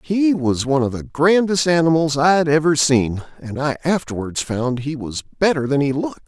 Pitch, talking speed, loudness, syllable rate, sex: 145 Hz, 190 wpm, -18 LUFS, 4.9 syllables/s, male